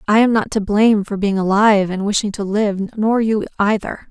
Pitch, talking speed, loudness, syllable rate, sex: 210 Hz, 205 wpm, -17 LUFS, 5.3 syllables/s, female